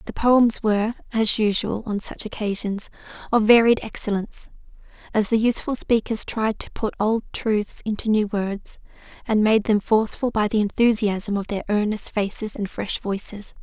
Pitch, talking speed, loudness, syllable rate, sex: 215 Hz, 155 wpm, -22 LUFS, 4.8 syllables/s, female